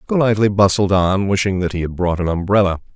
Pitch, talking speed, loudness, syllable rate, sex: 95 Hz, 205 wpm, -17 LUFS, 6.0 syllables/s, male